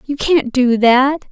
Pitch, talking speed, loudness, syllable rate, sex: 265 Hz, 180 wpm, -13 LUFS, 3.5 syllables/s, female